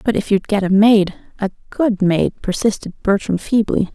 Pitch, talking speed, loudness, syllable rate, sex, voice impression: 200 Hz, 165 wpm, -17 LUFS, 4.8 syllables/s, female, feminine, very adult-like, slightly muffled, fluent, friendly, reassuring, sweet